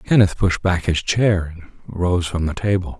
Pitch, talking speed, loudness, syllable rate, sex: 90 Hz, 200 wpm, -19 LUFS, 4.7 syllables/s, male